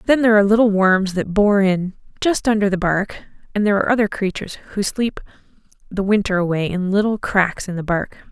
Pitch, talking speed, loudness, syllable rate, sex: 200 Hz, 200 wpm, -18 LUFS, 5.9 syllables/s, female